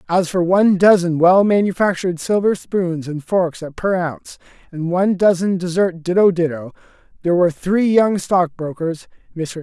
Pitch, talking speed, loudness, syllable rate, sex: 180 Hz, 155 wpm, -17 LUFS, 5.1 syllables/s, male